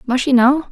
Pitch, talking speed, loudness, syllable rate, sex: 260 Hz, 250 wpm, -14 LUFS, 5.4 syllables/s, female